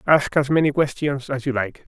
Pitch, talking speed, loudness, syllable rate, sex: 140 Hz, 215 wpm, -21 LUFS, 5.2 syllables/s, male